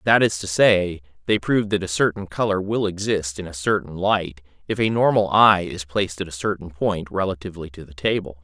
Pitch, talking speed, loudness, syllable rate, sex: 95 Hz, 215 wpm, -21 LUFS, 5.5 syllables/s, male